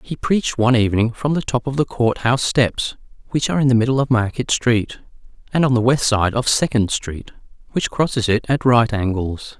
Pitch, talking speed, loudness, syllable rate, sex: 120 Hz, 215 wpm, -18 LUFS, 5.5 syllables/s, male